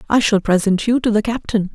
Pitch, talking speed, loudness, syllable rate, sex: 210 Hz, 240 wpm, -17 LUFS, 5.9 syllables/s, female